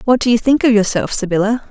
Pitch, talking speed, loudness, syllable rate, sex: 225 Hz, 245 wpm, -14 LUFS, 6.5 syllables/s, female